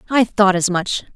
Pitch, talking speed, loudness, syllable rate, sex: 200 Hz, 210 wpm, -17 LUFS, 4.7 syllables/s, female